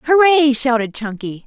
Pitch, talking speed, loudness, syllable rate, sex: 265 Hz, 125 wpm, -15 LUFS, 4.2 syllables/s, female